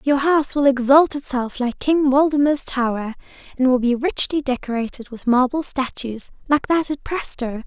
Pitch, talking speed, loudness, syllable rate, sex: 270 Hz, 165 wpm, -19 LUFS, 4.9 syllables/s, female